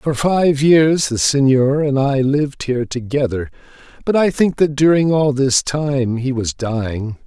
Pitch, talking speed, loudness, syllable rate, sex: 135 Hz, 175 wpm, -16 LUFS, 4.2 syllables/s, male